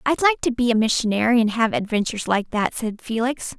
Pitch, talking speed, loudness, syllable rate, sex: 230 Hz, 220 wpm, -21 LUFS, 5.8 syllables/s, female